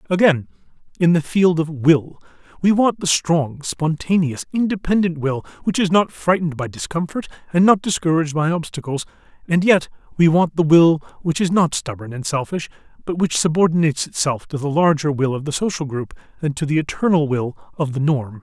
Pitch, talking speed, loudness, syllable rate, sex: 160 Hz, 180 wpm, -19 LUFS, 5.5 syllables/s, male